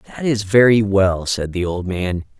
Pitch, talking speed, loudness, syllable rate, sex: 100 Hz, 200 wpm, -17 LUFS, 4.7 syllables/s, male